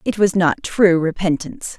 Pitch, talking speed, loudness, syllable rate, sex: 180 Hz, 170 wpm, -17 LUFS, 4.7 syllables/s, female